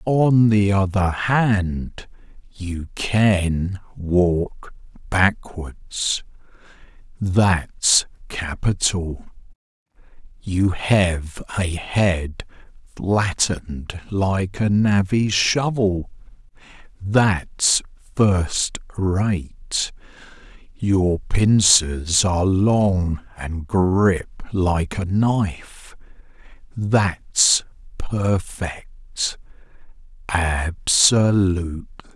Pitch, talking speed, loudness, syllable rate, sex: 95 Hz, 65 wpm, -20 LUFS, 2.2 syllables/s, male